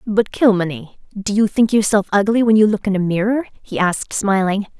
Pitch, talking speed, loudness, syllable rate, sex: 205 Hz, 200 wpm, -17 LUFS, 5.4 syllables/s, female